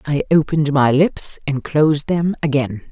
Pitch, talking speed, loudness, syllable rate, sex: 145 Hz, 165 wpm, -17 LUFS, 4.8 syllables/s, female